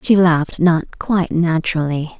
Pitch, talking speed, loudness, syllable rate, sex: 165 Hz, 135 wpm, -17 LUFS, 4.8 syllables/s, female